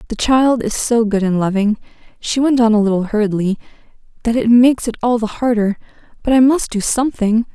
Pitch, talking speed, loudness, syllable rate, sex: 225 Hz, 190 wpm, -15 LUFS, 5.8 syllables/s, female